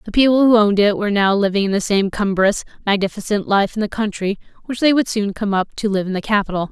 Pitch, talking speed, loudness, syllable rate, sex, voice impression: 205 Hz, 240 wpm, -17 LUFS, 6.3 syllables/s, female, feminine, very adult-like, clear, slightly intellectual, slightly elegant, slightly strict